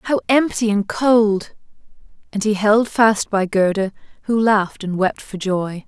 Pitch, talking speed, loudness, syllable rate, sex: 210 Hz, 165 wpm, -18 LUFS, 4.1 syllables/s, female